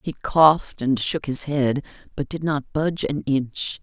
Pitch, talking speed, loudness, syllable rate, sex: 140 Hz, 190 wpm, -22 LUFS, 4.2 syllables/s, female